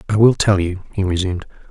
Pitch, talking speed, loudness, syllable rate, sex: 95 Hz, 210 wpm, -18 LUFS, 6.5 syllables/s, male